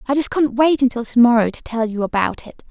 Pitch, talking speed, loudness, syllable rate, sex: 245 Hz, 265 wpm, -17 LUFS, 6.0 syllables/s, female